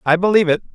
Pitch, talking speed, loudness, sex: 180 Hz, 240 wpm, -15 LUFS, male